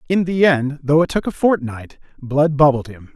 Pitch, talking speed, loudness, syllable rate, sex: 145 Hz, 210 wpm, -17 LUFS, 4.7 syllables/s, male